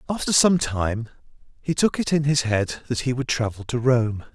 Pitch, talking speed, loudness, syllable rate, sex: 130 Hz, 205 wpm, -22 LUFS, 4.9 syllables/s, male